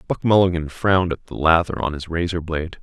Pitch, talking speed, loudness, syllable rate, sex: 85 Hz, 190 wpm, -20 LUFS, 6.1 syllables/s, male